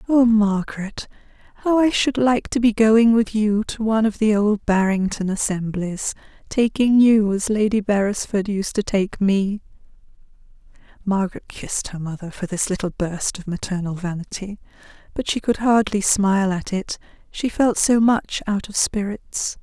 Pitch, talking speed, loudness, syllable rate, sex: 205 Hz, 155 wpm, -20 LUFS, 4.6 syllables/s, female